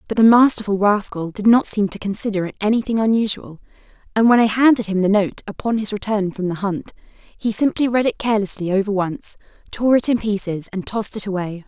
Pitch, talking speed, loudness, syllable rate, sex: 210 Hz, 205 wpm, -18 LUFS, 5.8 syllables/s, female